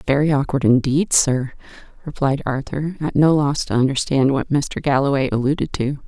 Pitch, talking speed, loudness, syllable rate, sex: 140 Hz, 160 wpm, -19 LUFS, 5.1 syllables/s, female